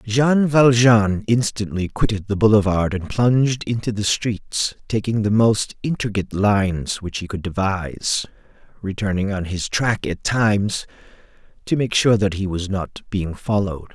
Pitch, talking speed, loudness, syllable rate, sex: 105 Hz, 150 wpm, -20 LUFS, 4.5 syllables/s, male